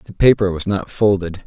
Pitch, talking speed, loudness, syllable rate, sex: 95 Hz, 205 wpm, -17 LUFS, 5.3 syllables/s, male